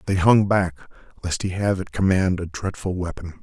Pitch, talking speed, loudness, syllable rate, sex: 95 Hz, 195 wpm, -22 LUFS, 5.2 syllables/s, male